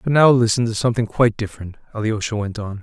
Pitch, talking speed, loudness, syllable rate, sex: 110 Hz, 215 wpm, -19 LUFS, 7.0 syllables/s, male